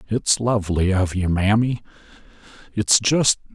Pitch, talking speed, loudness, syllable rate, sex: 105 Hz, 100 wpm, -19 LUFS, 4.4 syllables/s, male